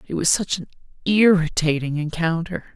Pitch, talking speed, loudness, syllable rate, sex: 170 Hz, 130 wpm, -21 LUFS, 4.9 syllables/s, female